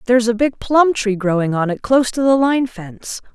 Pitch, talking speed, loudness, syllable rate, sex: 235 Hz, 235 wpm, -16 LUFS, 5.5 syllables/s, female